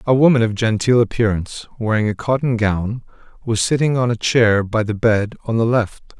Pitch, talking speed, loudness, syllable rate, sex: 115 Hz, 195 wpm, -18 LUFS, 5.3 syllables/s, male